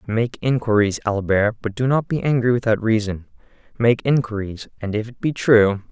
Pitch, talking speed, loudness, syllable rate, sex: 115 Hz, 170 wpm, -20 LUFS, 5.0 syllables/s, male